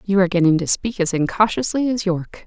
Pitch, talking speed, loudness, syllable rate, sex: 190 Hz, 220 wpm, -19 LUFS, 6.4 syllables/s, female